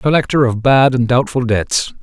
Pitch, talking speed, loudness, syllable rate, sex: 125 Hz, 180 wpm, -14 LUFS, 4.7 syllables/s, male